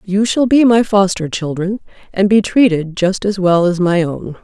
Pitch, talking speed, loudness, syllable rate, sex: 195 Hz, 190 wpm, -14 LUFS, 4.5 syllables/s, female